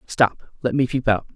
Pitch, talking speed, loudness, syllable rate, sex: 120 Hz, 220 wpm, -21 LUFS, 4.6 syllables/s, male